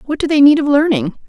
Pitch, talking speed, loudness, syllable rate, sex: 285 Hz, 280 wpm, -13 LUFS, 6.7 syllables/s, female